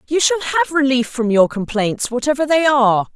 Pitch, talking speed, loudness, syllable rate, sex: 260 Hz, 190 wpm, -16 LUFS, 5.0 syllables/s, female